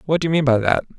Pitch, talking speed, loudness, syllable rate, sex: 140 Hz, 365 wpm, -18 LUFS, 8.7 syllables/s, male